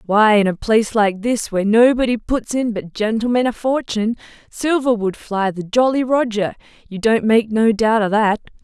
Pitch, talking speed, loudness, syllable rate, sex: 220 Hz, 190 wpm, -17 LUFS, 5.0 syllables/s, female